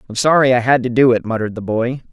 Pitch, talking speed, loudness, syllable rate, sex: 120 Hz, 285 wpm, -15 LUFS, 6.9 syllables/s, male